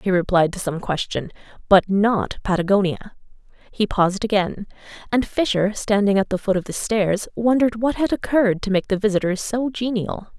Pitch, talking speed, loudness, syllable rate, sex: 205 Hz, 175 wpm, -20 LUFS, 5.2 syllables/s, female